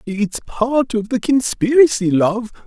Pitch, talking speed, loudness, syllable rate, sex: 230 Hz, 135 wpm, -17 LUFS, 3.8 syllables/s, male